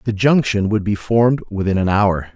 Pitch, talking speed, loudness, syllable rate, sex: 105 Hz, 205 wpm, -17 LUFS, 5.2 syllables/s, male